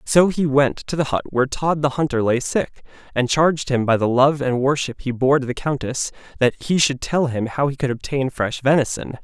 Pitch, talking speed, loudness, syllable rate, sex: 135 Hz, 235 wpm, -20 LUFS, 5.3 syllables/s, male